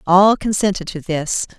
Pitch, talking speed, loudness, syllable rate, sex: 185 Hz, 150 wpm, -17 LUFS, 4.5 syllables/s, female